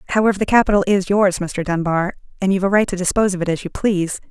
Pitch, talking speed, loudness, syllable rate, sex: 190 Hz, 250 wpm, -18 LUFS, 7.5 syllables/s, female